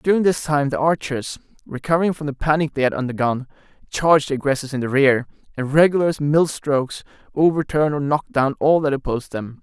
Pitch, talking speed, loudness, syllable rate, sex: 145 Hz, 195 wpm, -20 LUFS, 6.0 syllables/s, male